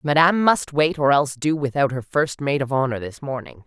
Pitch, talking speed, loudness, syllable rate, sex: 140 Hz, 230 wpm, -21 LUFS, 5.6 syllables/s, female